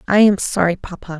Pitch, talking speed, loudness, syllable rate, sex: 185 Hz, 200 wpm, -16 LUFS, 5.6 syllables/s, female